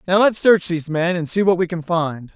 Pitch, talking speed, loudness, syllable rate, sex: 175 Hz, 280 wpm, -18 LUFS, 5.5 syllables/s, male